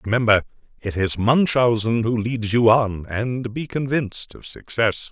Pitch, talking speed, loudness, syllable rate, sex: 115 Hz, 150 wpm, -20 LUFS, 4.3 syllables/s, male